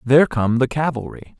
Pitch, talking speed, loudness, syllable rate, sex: 130 Hz, 175 wpm, -18 LUFS, 5.5 syllables/s, male